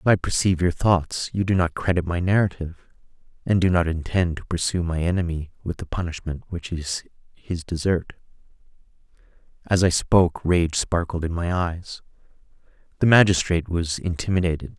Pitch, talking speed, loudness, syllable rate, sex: 85 Hz, 155 wpm, -23 LUFS, 5.4 syllables/s, male